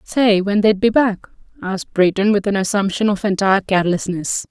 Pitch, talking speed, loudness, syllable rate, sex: 200 Hz, 175 wpm, -17 LUFS, 5.4 syllables/s, female